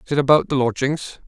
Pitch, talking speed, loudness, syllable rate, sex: 140 Hz, 235 wpm, -19 LUFS, 6.4 syllables/s, male